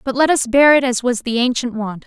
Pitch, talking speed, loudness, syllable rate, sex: 250 Hz, 290 wpm, -16 LUFS, 5.6 syllables/s, female